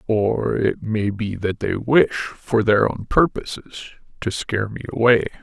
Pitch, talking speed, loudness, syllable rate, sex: 110 Hz, 165 wpm, -20 LUFS, 4.2 syllables/s, male